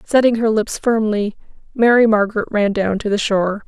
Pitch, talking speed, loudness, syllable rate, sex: 215 Hz, 180 wpm, -17 LUFS, 5.3 syllables/s, female